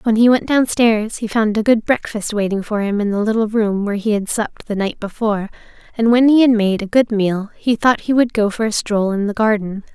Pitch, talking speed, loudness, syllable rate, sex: 215 Hz, 255 wpm, -17 LUFS, 5.5 syllables/s, female